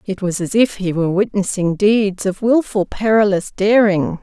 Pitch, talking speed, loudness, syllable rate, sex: 200 Hz, 170 wpm, -16 LUFS, 4.7 syllables/s, female